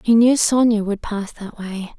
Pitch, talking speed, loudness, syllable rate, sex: 220 Hz, 210 wpm, -18 LUFS, 4.6 syllables/s, female